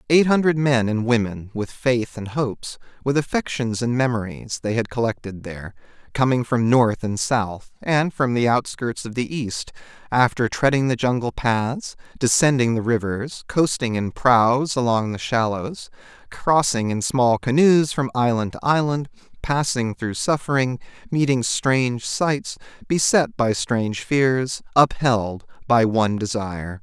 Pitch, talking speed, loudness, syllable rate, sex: 125 Hz, 145 wpm, -21 LUFS, 4.3 syllables/s, male